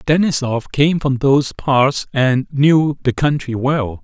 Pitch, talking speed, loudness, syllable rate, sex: 140 Hz, 150 wpm, -16 LUFS, 3.8 syllables/s, male